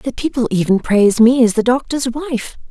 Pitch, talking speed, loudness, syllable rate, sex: 240 Hz, 200 wpm, -15 LUFS, 5.1 syllables/s, female